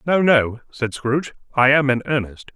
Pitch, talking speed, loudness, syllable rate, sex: 130 Hz, 190 wpm, -19 LUFS, 4.9 syllables/s, male